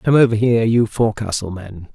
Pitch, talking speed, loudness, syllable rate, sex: 110 Hz, 185 wpm, -17 LUFS, 6.0 syllables/s, male